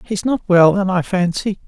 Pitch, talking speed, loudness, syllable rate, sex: 190 Hz, 215 wpm, -16 LUFS, 4.8 syllables/s, female